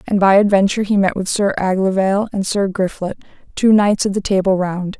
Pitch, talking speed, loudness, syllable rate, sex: 195 Hz, 205 wpm, -16 LUFS, 5.7 syllables/s, female